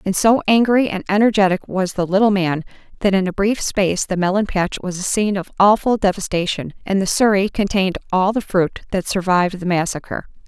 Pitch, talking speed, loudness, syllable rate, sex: 195 Hz, 195 wpm, -18 LUFS, 5.7 syllables/s, female